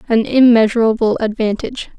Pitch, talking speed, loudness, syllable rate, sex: 225 Hz, 90 wpm, -14 LUFS, 5.9 syllables/s, female